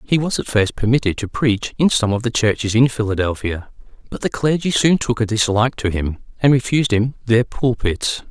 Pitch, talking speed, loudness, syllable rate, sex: 115 Hz, 200 wpm, -18 LUFS, 5.4 syllables/s, male